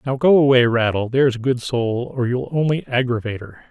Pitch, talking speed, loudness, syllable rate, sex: 125 Hz, 210 wpm, -18 LUFS, 6.0 syllables/s, male